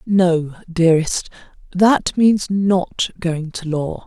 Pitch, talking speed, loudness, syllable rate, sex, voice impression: 180 Hz, 105 wpm, -18 LUFS, 3.0 syllables/s, female, slightly feminine, very adult-like, slightly muffled, slightly kind